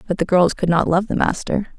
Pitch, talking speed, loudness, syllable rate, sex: 185 Hz, 270 wpm, -18 LUFS, 5.6 syllables/s, female